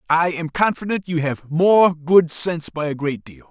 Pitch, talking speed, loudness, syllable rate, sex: 160 Hz, 205 wpm, -19 LUFS, 4.6 syllables/s, male